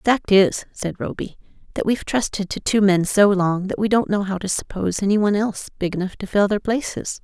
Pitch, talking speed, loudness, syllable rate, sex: 200 Hz, 240 wpm, -20 LUFS, 5.9 syllables/s, female